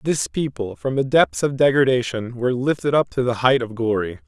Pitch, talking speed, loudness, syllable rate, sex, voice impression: 130 Hz, 210 wpm, -20 LUFS, 5.4 syllables/s, male, masculine, adult-like, tensed, powerful, bright, hard, clear, fluent, cool, intellectual, calm, friendly, wild, lively, slightly light